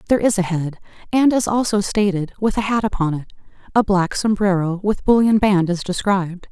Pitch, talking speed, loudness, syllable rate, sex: 195 Hz, 185 wpm, -19 LUFS, 5.6 syllables/s, female